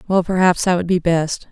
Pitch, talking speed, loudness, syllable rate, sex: 175 Hz, 240 wpm, -17 LUFS, 5.2 syllables/s, female